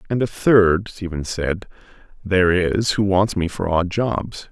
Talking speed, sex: 175 wpm, male